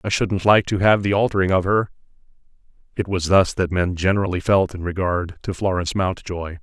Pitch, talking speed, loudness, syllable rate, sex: 95 Hz, 190 wpm, -20 LUFS, 5.6 syllables/s, male